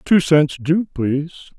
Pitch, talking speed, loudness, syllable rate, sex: 155 Hz, 150 wpm, -18 LUFS, 4.4 syllables/s, male